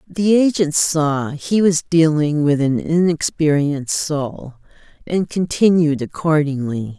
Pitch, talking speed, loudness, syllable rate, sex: 155 Hz, 110 wpm, -17 LUFS, 3.8 syllables/s, female